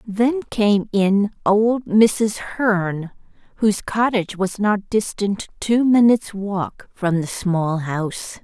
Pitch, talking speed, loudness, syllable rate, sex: 205 Hz, 130 wpm, -19 LUFS, 3.4 syllables/s, female